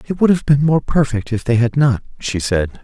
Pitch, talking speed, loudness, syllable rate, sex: 130 Hz, 255 wpm, -16 LUFS, 5.1 syllables/s, male